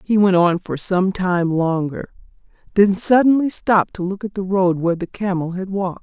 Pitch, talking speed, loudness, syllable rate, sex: 190 Hz, 200 wpm, -18 LUFS, 5.1 syllables/s, female